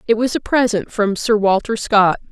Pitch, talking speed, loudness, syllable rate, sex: 210 Hz, 205 wpm, -17 LUFS, 4.9 syllables/s, female